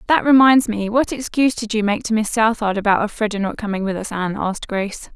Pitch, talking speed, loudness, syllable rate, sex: 220 Hz, 235 wpm, -18 LUFS, 6.3 syllables/s, female